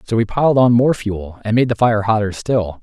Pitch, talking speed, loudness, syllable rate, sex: 110 Hz, 255 wpm, -16 LUFS, 5.3 syllables/s, male